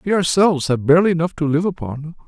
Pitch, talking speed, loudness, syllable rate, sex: 165 Hz, 210 wpm, -17 LUFS, 6.7 syllables/s, male